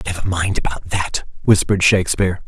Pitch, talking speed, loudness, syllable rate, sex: 90 Hz, 145 wpm, -18 LUFS, 6.1 syllables/s, male